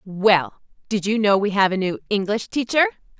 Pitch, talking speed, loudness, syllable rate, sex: 205 Hz, 170 wpm, -20 LUFS, 5.0 syllables/s, female